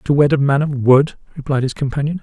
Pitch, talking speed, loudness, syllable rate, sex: 140 Hz, 245 wpm, -16 LUFS, 6.0 syllables/s, male